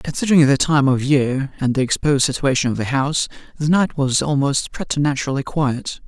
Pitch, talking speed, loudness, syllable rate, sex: 140 Hz, 180 wpm, -18 LUFS, 5.7 syllables/s, male